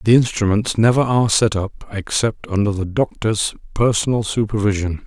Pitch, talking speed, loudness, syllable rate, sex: 110 Hz, 140 wpm, -18 LUFS, 5.0 syllables/s, male